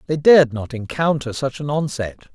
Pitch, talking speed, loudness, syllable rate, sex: 135 Hz, 180 wpm, -19 LUFS, 5.4 syllables/s, male